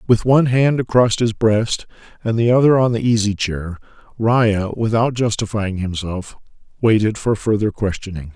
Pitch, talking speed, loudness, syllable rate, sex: 110 Hz, 150 wpm, -18 LUFS, 4.8 syllables/s, male